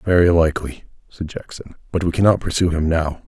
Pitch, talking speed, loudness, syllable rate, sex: 85 Hz, 180 wpm, -19 LUFS, 5.9 syllables/s, male